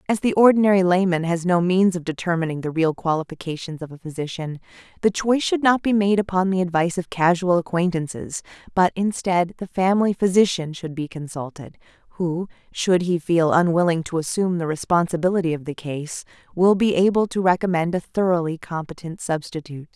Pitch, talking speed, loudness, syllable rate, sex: 175 Hz, 170 wpm, -21 LUFS, 5.7 syllables/s, female